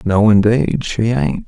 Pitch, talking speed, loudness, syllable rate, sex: 110 Hz, 165 wpm, -15 LUFS, 3.5 syllables/s, male